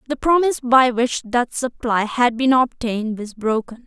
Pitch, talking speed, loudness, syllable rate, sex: 245 Hz, 170 wpm, -19 LUFS, 4.7 syllables/s, female